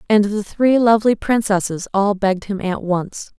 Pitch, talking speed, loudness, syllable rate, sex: 205 Hz, 175 wpm, -18 LUFS, 4.9 syllables/s, female